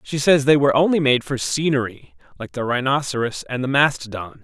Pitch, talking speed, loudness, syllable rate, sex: 135 Hz, 175 wpm, -19 LUFS, 5.7 syllables/s, male